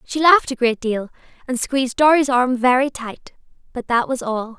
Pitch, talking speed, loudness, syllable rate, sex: 250 Hz, 195 wpm, -18 LUFS, 5.1 syllables/s, female